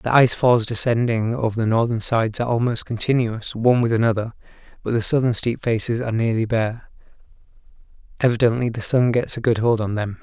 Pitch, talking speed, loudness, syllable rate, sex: 115 Hz, 180 wpm, -20 LUFS, 6.0 syllables/s, male